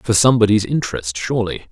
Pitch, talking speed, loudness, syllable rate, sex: 105 Hz, 140 wpm, -17 LUFS, 7.0 syllables/s, male